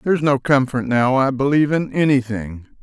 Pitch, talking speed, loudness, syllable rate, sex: 130 Hz, 190 wpm, -18 LUFS, 5.8 syllables/s, male